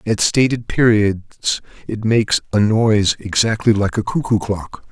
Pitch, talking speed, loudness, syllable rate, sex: 110 Hz, 145 wpm, -17 LUFS, 4.4 syllables/s, male